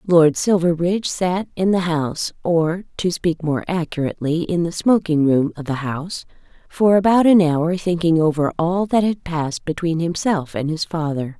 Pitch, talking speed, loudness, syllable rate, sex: 170 Hz, 165 wpm, -19 LUFS, 4.8 syllables/s, female